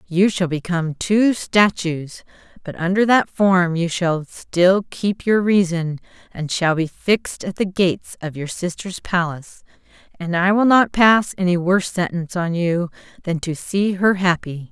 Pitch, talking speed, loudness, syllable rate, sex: 180 Hz, 165 wpm, -19 LUFS, 4.4 syllables/s, female